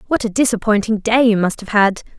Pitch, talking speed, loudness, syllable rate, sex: 220 Hz, 220 wpm, -16 LUFS, 5.9 syllables/s, female